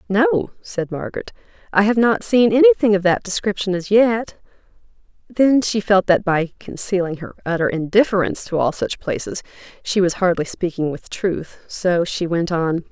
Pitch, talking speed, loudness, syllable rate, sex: 195 Hz, 165 wpm, -19 LUFS, 4.8 syllables/s, female